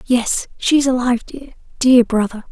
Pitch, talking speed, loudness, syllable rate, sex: 245 Hz, 165 wpm, -16 LUFS, 5.0 syllables/s, female